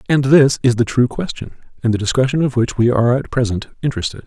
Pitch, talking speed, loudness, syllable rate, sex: 125 Hz, 225 wpm, -16 LUFS, 6.7 syllables/s, male